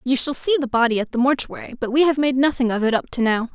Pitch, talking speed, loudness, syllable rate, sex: 255 Hz, 305 wpm, -20 LUFS, 6.6 syllables/s, female